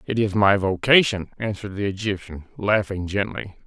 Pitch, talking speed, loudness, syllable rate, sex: 100 Hz, 145 wpm, -22 LUFS, 5.3 syllables/s, male